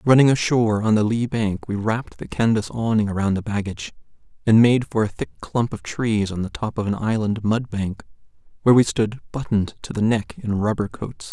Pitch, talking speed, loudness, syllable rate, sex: 110 Hz, 205 wpm, -21 LUFS, 5.5 syllables/s, male